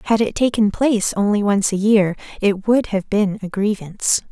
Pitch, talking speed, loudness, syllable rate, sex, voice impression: 205 Hz, 195 wpm, -18 LUFS, 5.1 syllables/s, female, feminine, adult-like, slightly middle-aged, very thin, slightly relaxed, slightly weak, slightly dark, slightly hard, clear, fluent, cute, intellectual, slightly refreshing, sincere, calm, friendly, slightly reassuring, unique, sweet, slightly lively, very kind, modest, slightly light